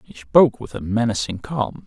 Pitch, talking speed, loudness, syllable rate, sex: 110 Hz, 195 wpm, -20 LUFS, 5.1 syllables/s, male